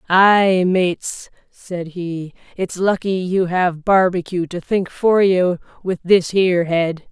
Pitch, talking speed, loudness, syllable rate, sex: 180 Hz, 145 wpm, -18 LUFS, 3.5 syllables/s, female